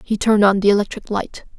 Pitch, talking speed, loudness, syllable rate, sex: 205 Hz, 230 wpm, -17 LUFS, 6.5 syllables/s, female